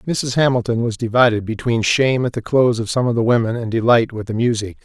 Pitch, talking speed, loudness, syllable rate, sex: 120 Hz, 235 wpm, -17 LUFS, 6.3 syllables/s, male